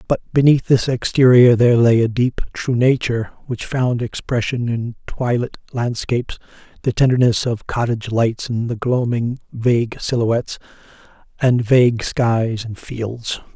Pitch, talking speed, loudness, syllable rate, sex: 120 Hz, 135 wpm, -18 LUFS, 4.6 syllables/s, male